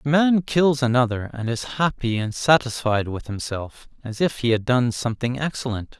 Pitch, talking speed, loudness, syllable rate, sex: 125 Hz, 180 wpm, -22 LUFS, 4.9 syllables/s, male